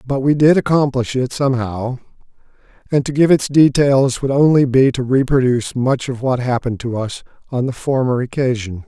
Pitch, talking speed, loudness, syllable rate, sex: 130 Hz, 175 wpm, -16 LUFS, 5.3 syllables/s, male